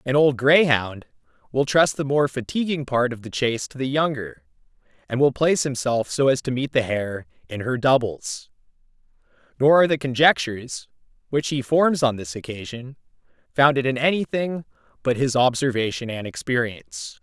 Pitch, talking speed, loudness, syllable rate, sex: 130 Hz, 165 wpm, -22 LUFS, 5.2 syllables/s, male